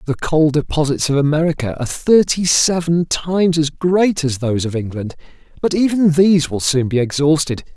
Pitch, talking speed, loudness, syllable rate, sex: 155 Hz, 170 wpm, -16 LUFS, 5.3 syllables/s, male